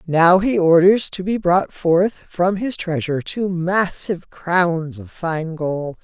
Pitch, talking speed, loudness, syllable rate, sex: 175 Hz, 160 wpm, -18 LUFS, 3.6 syllables/s, female